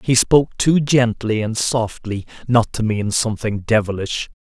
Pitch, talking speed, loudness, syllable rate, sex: 115 Hz, 150 wpm, -18 LUFS, 4.5 syllables/s, male